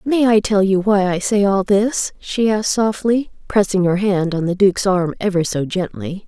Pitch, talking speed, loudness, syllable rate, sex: 195 Hz, 210 wpm, -17 LUFS, 4.8 syllables/s, female